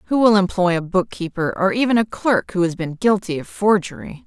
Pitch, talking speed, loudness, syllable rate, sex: 195 Hz, 210 wpm, -19 LUFS, 5.5 syllables/s, female